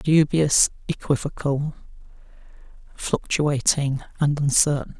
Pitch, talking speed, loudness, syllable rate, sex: 145 Hz, 60 wpm, -22 LUFS, 3.8 syllables/s, male